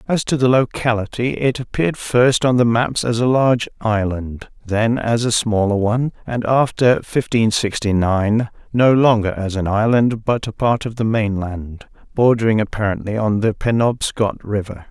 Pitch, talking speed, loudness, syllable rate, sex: 115 Hz, 165 wpm, -18 LUFS, 4.6 syllables/s, male